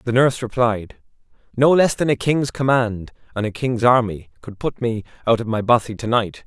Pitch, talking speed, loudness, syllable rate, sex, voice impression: 115 Hz, 205 wpm, -19 LUFS, 5.1 syllables/s, male, masculine, adult-like, tensed, powerful, slightly muffled, fluent, friendly, wild, lively, slightly intense, light